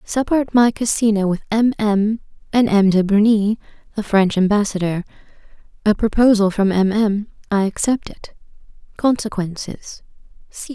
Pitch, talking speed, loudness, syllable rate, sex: 210 Hz, 125 wpm, -18 LUFS, 4.7 syllables/s, female